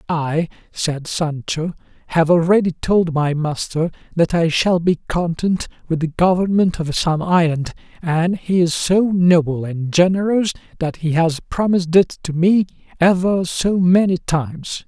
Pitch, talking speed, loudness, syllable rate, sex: 170 Hz, 150 wpm, -18 LUFS, 4.2 syllables/s, male